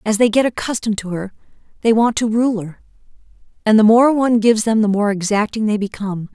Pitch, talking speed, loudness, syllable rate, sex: 220 Hz, 210 wpm, -16 LUFS, 6.3 syllables/s, female